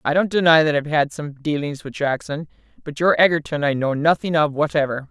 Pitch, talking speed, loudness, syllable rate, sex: 150 Hz, 210 wpm, -19 LUFS, 5.8 syllables/s, female